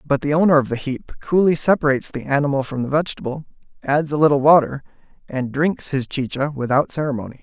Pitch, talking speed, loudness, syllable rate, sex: 140 Hz, 185 wpm, -19 LUFS, 6.2 syllables/s, male